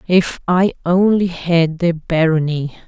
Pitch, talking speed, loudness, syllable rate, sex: 170 Hz, 125 wpm, -16 LUFS, 3.7 syllables/s, female